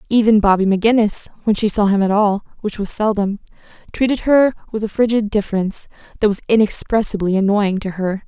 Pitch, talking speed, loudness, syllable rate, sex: 210 Hz, 160 wpm, -17 LUFS, 6.1 syllables/s, female